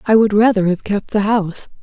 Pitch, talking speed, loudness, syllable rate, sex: 205 Hz, 230 wpm, -16 LUFS, 5.8 syllables/s, female